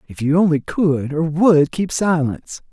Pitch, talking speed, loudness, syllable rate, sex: 160 Hz, 175 wpm, -17 LUFS, 4.4 syllables/s, male